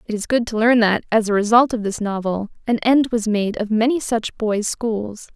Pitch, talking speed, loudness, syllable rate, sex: 220 Hz, 235 wpm, -19 LUFS, 4.9 syllables/s, female